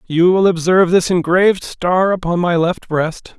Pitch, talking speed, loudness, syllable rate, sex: 175 Hz, 175 wpm, -15 LUFS, 4.7 syllables/s, male